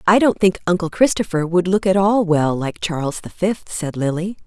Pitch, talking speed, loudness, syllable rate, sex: 180 Hz, 215 wpm, -18 LUFS, 4.8 syllables/s, female